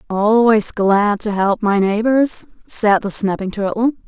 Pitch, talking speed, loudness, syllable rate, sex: 210 Hz, 145 wpm, -16 LUFS, 3.9 syllables/s, female